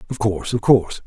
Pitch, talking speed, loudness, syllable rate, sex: 110 Hz, 225 wpm, -19 LUFS, 7.1 syllables/s, male